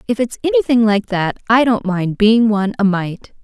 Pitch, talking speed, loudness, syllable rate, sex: 215 Hz, 210 wpm, -15 LUFS, 5.0 syllables/s, female